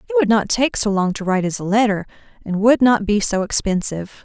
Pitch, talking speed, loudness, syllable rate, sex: 215 Hz, 240 wpm, -18 LUFS, 6.1 syllables/s, female